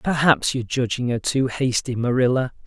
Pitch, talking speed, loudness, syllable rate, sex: 125 Hz, 155 wpm, -21 LUFS, 5.3 syllables/s, male